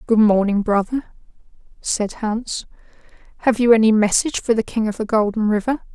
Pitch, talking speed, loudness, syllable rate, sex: 220 Hz, 160 wpm, -19 LUFS, 5.3 syllables/s, female